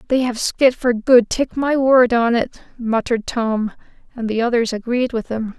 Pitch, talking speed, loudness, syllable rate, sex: 235 Hz, 195 wpm, -18 LUFS, 4.8 syllables/s, female